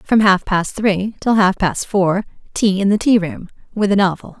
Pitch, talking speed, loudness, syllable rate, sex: 195 Hz, 205 wpm, -16 LUFS, 4.6 syllables/s, female